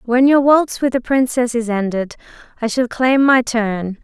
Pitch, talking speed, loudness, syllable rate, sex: 240 Hz, 195 wpm, -16 LUFS, 4.3 syllables/s, female